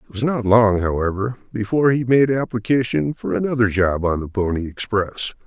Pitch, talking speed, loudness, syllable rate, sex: 110 Hz, 175 wpm, -19 LUFS, 5.4 syllables/s, male